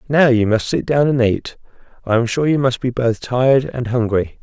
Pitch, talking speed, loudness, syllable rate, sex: 120 Hz, 230 wpm, -17 LUFS, 5.0 syllables/s, male